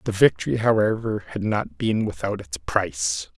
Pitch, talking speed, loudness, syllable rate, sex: 110 Hz, 160 wpm, -23 LUFS, 4.8 syllables/s, male